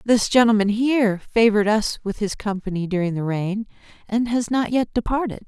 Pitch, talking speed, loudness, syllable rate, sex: 215 Hz, 155 wpm, -21 LUFS, 5.4 syllables/s, female